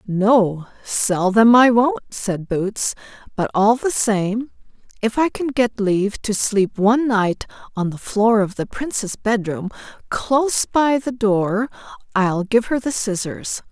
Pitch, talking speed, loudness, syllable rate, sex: 220 Hz, 155 wpm, -19 LUFS, 3.7 syllables/s, female